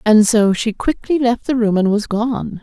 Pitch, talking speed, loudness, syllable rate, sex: 225 Hz, 230 wpm, -16 LUFS, 4.4 syllables/s, female